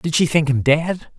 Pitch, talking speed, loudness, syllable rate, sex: 155 Hz, 255 wpm, -18 LUFS, 4.6 syllables/s, male